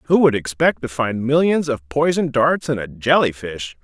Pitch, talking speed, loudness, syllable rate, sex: 130 Hz, 205 wpm, -19 LUFS, 5.0 syllables/s, male